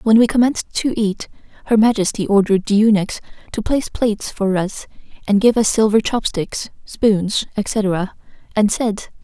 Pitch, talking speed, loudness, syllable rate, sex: 215 Hz, 155 wpm, -17 LUFS, 4.8 syllables/s, female